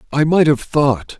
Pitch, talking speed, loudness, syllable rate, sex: 145 Hz, 200 wpm, -15 LUFS, 4.3 syllables/s, male